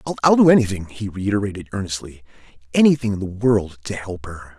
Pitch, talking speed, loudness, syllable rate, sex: 105 Hz, 155 wpm, -20 LUFS, 6.5 syllables/s, male